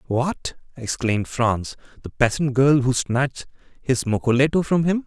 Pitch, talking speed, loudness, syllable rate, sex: 130 Hz, 140 wpm, -21 LUFS, 4.6 syllables/s, male